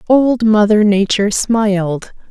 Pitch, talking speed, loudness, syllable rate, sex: 210 Hz, 105 wpm, -13 LUFS, 4.0 syllables/s, female